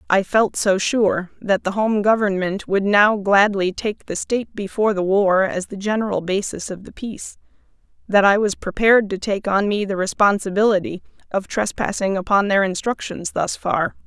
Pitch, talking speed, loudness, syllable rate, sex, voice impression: 200 Hz, 175 wpm, -19 LUFS, 4.8 syllables/s, female, very feminine, middle-aged, slightly tensed, slightly weak, bright, slightly soft, clear, fluent, cute, slightly cool, very intellectual, very refreshing, sincere, calm, friendly, reassuring, very unique, elegant, wild, slightly sweet, lively, strict, slightly intense